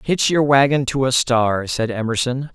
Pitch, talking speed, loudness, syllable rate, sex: 130 Hz, 190 wpm, -18 LUFS, 4.5 syllables/s, male